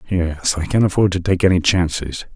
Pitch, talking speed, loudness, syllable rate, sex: 90 Hz, 205 wpm, -17 LUFS, 5.3 syllables/s, male